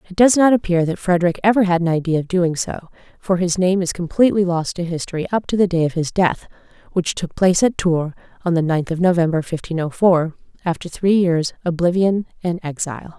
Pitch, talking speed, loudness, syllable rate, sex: 175 Hz, 215 wpm, -18 LUFS, 5.8 syllables/s, female